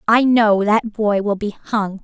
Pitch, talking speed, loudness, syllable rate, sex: 210 Hz, 205 wpm, -17 LUFS, 4.1 syllables/s, female